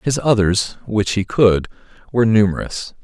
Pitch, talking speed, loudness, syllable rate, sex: 105 Hz, 100 wpm, -17 LUFS, 4.7 syllables/s, male